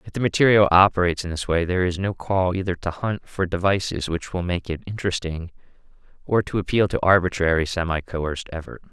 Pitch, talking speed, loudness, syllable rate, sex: 90 Hz, 195 wpm, -22 LUFS, 6.1 syllables/s, male